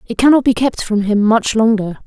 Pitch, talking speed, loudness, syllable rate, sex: 225 Hz, 230 wpm, -14 LUFS, 5.3 syllables/s, female